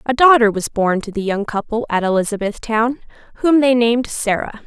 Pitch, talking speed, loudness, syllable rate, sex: 225 Hz, 180 wpm, -17 LUFS, 5.3 syllables/s, female